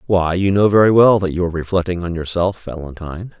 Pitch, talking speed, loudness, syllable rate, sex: 90 Hz, 210 wpm, -16 LUFS, 6.2 syllables/s, male